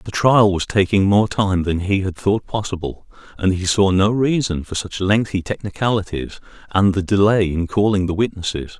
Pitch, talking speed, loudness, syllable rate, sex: 95 Hz, 185 wpm, -18 LUFS, 4.9 syllables/s, male